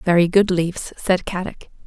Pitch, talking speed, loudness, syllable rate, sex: 180 Hz, 160 wpm, -19 LUFS, 4.9 syllables/s, female